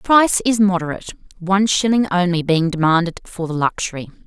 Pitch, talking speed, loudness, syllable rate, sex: 185 Hz, 170 wpm, -17 LUFS, 6.1 syllables/s, female